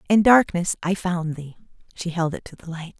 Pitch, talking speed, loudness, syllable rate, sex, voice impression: 175 Hz, 220 wpm, -21 LUFS, 3.9 syllables/s, female, very feminine, middle-aged, relaxed, slightly weak, bright, very soft, very clear, fluent, slightly raspy, very cute, very intellectual, very refreshing, sincere, very calm, very friendly, very reassuring, very unique, very elegant, very sweet, lively, very kind, slightly modest, light